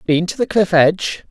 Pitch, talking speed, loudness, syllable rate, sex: 175 Hz, 230 wpm, -16 LUFS, 5.2 syllables/s, male